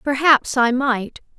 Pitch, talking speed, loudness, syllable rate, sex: 260 Hz, 130 wpm, -17 LUFS, 3.5 syllables/s, female